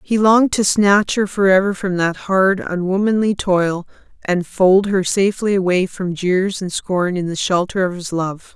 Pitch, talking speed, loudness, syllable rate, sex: 190 Hz, 180 wpm, -17 LUFS, 4.5 syllables/s, female